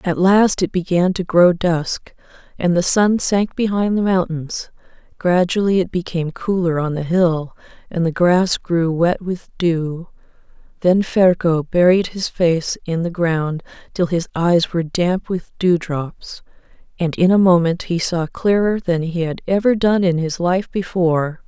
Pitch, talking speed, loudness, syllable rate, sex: 175 Hz, 165 wpm, -18 LUFS, 4.1 syllables/s, female